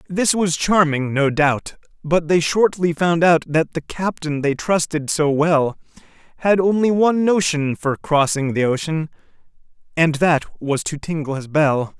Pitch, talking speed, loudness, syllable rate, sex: 160 Hz, 160 wpm, -18 LUFS, 4.2 syllables/s, male